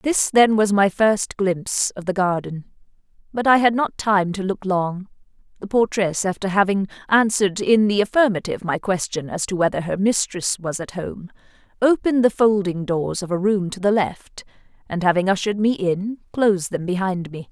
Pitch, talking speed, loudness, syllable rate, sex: 195 Hz, 185 wpm, -20 LUFS, 5.1 syllables/s, female